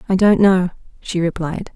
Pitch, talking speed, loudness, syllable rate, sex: 185 Hz, 170 wpm, -17 LUFS, 4.9 syllables/s, female